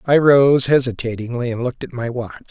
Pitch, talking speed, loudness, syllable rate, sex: 125 Hz, 190 wpm, -17 LUFS, 5.6 syllables/s, male